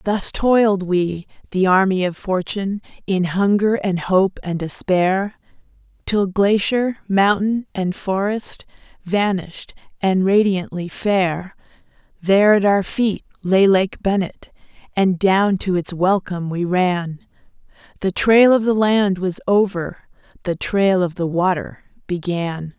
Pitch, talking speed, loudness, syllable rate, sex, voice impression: 190 Hz, 130 wpm, -19 LUFS, 3.8 syllables/s, female, very feminine, slightly young, adult-like, thin, slightly tensed, slightly powerful, bright, hard, clear, slightly fluent, cool, intellectual, slightly refreshing, very sincere, very calm, very friendly, reassuring, unique, elegant, slightly wild, sweet, kind